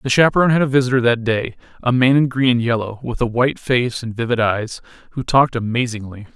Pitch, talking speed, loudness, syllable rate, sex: 125 Hz, 215 wpm, -17 LUFS, 6.3 syllables/s, male